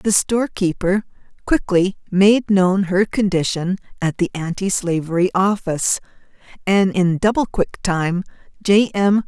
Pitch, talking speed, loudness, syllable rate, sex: 190 Hz, 130 wpm, -18 LUFS, 4.3 syllables/s, female